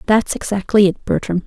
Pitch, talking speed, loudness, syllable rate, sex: 200 Hz, 165 wpm, -17 LUFS, 5.4 syllables/s, female